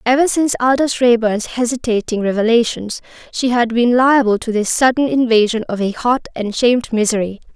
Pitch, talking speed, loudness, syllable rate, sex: 235 Hz, 160 wpm, -15 LUFS, 5.4 syllables/s, female